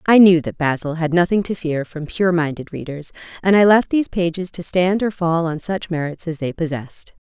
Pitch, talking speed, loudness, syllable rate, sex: 170 Hz, 225 wpm, -19 LUFS, 5.3 syllables/s, female